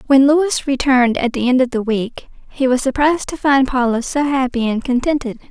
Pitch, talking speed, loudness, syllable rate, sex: 260 Hz, 205 wpm, -16 LUFS, 5.3 syllables/s, female